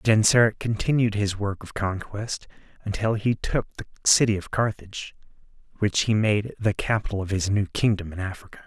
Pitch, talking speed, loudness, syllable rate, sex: 105 Hz, 165 wpm, -24 LUFS, 5.3 syllables/s, male